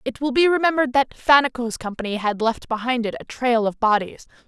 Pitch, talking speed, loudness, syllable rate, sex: 245 Hz, 200 wpm, -20 LUFS, 6.0 syllables/s, female